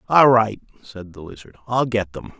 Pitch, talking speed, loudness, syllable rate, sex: 110 Hz, 200 wpm, -19 LUFS, 4.9 syllables/s, male